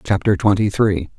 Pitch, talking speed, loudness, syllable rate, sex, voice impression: 100 Hz, 150 wpm, -17 LUFS, 4.9 syllables/s, male, very masculine, very adult-like, old, very thick, tensed, very powerful, bright, very soft, muffled, fluent, raspy, very cool, very intellectual, slightly refreshing, very sincere, very calm, very mature, very friendly, very reassuring, very unique, elegant, very wild, very sweet, kind